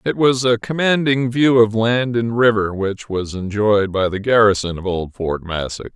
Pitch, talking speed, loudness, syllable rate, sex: 110 Hz, 190 wpm, -17 LUFS, 4.5 syllables/s, male